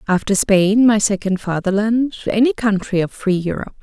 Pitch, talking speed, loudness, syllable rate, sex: 205 Hz, 155 wpm, -17 LUFS, 5.1 syllables/s, female